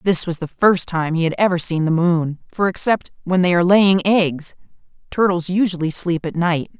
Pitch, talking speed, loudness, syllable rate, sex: 175 Hz, 205 wpm, -18 LUFS, 5.0 syllables/s, female